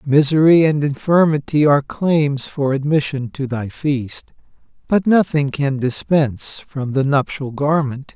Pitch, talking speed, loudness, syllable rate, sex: 145 Hz, 130 wpm, -17 LUFS, 4.1 syllables/s, male